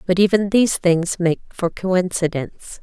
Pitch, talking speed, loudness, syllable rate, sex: 180 Hz, 150 wpm, -19 LUFS, 4.6 syllables/s, female